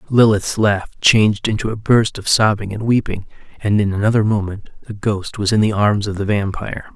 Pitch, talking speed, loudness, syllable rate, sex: 105 Hz, 200 wpm, -17 LUFS, 5.3 syllables/s, male